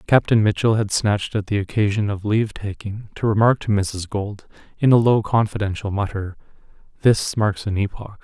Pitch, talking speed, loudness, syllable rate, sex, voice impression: 105 Hz, 175 wpm, -20 LUFS, 5.2 syllables/s, male, very masculine, middle-aged, very thick, relaxed, weak, very dark, very soft, muffled, fluent, slightly raspy, cool, very intellectual, slightly refreshing, very sincere, very calm, mature, very friendly, very reassuring, very unique, very elegant, slightly wild, very sweet, lively, very kind, very modest